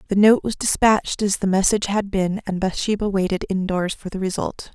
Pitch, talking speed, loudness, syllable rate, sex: 195 Hz, 200 wpm, -21 LUFS, 5.6 syllables/s, female